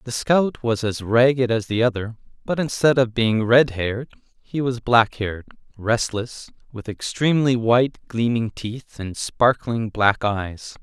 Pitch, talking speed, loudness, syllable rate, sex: 115 Hz, 155 wpm, -21 LUFS, 4.2 syllables/s, male